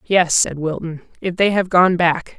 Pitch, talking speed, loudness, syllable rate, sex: 175 Hz, 200 wpm, -17 LUFS, 4.3 syllables/s, female